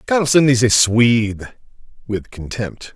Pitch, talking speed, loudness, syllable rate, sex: 120 Hz, 120 wpm, -16 LUFS, 3.9 syllables/s, male